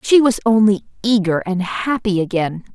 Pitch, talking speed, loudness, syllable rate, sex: 205 Hz, 155 wpm, -17 LUFS, 4.8 syllables/s, female